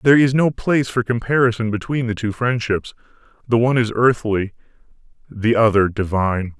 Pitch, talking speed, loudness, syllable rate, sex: 115 Hz, 155 wpm, -18 LUFS, 5.7 syllables/s, male